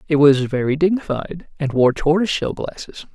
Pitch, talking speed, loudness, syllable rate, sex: 150 Hz, 170 wpm, -18 LUFS, 5.3 syllables/s, male